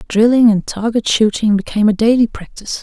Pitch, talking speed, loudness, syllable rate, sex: 220 Hz, 170 wpm, -14 LUFS, 6.0 syllables/s, female